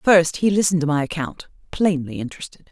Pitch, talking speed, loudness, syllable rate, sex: 165 Hz, 175 wpm, -20 LUFS, 6.1 syllables/s, female